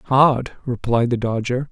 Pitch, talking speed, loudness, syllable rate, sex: 125 Hz, 140 wpm, -20 LUFS, 3.9 syllables/s, male